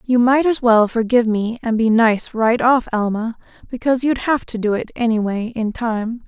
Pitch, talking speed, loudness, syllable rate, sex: 230 Hz, 200 wpm, -18 LUFS, 4.9 syllables/s, female